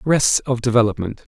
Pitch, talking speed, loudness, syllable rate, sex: 120 Hz, 135 wpm, -18 LUFS, 6.0 syllables/s, male